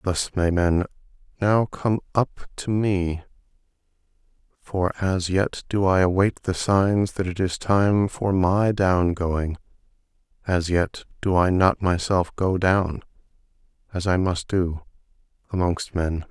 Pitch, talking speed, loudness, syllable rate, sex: 95 Hz, 140 wpm, -23 LUFS, 3.7 syllables/s, male